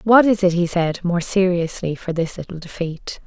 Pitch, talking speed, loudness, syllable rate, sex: 180 Hz, 200 wpm, -20 LUFS, 4.8 syllables/s, female